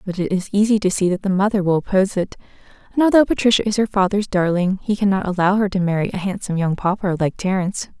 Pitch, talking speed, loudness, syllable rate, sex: 190 Hz, 235 wpm, -19 LUFS, 6.8 syllables/s, female